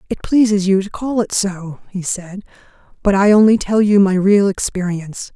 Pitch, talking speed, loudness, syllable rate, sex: 195 Hz, 190 wpm, -15 LUFS, 5.0 syllables/s, female